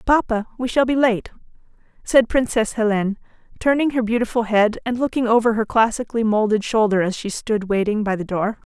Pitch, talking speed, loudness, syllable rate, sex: 225 Hz, 180 wpm, -19 LUFS, 5.7 syllables/s, female